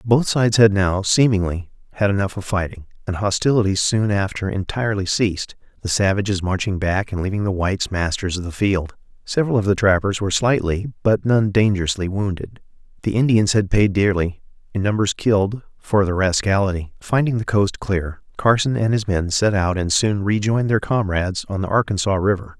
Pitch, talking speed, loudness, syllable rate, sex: 100 Hz, 180 wpm, -19 LUFS, 5.5 syllables/s, male